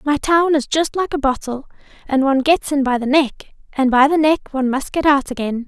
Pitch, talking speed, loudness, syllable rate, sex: 280 Hz, 245 wpm, -17 LUFS, 5.5 syllables/s, female